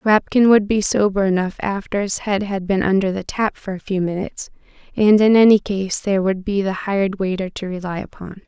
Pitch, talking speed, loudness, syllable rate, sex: 195 Hz, 210 wpm, -18 LUFS, 5.3 syllables/s, female